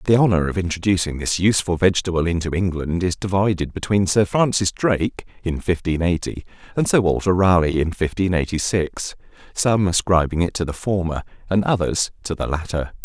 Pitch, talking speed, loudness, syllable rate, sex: 90 Hz, 170 wpm, -20 LUFS, 5.5 syllables/s, male